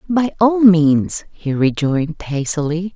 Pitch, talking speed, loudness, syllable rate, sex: 175 Hz, 120 wpm, -16 LUFS, 3.9 syllables/s, female